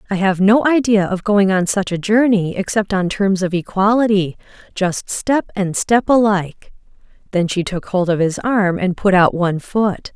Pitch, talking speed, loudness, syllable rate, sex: 195 Hz, 185 wpm, -16 LUFS, 4.7 syllables/s, female